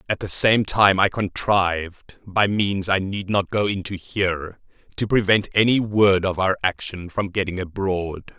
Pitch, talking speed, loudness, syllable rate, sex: 95 Hz, 170 wpm, -21 LUFS, 4.3 syllables/s, male